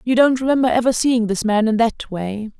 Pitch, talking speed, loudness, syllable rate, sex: 235 Hz, 230 wpm, -18 LUFS, 5.4 syllables/s, female